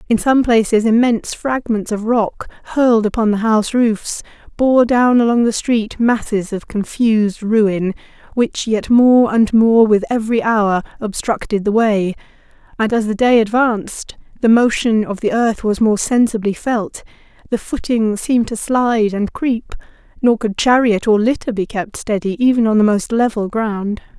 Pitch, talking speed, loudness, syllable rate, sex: 220 Hz, 160 wpm, -16 LUFS, 4.6 syllables/s, female